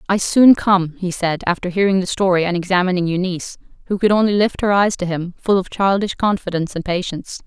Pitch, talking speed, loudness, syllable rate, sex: 185 Hz, 210 wpm, -17 LUFS, 6.0 syllables/s, female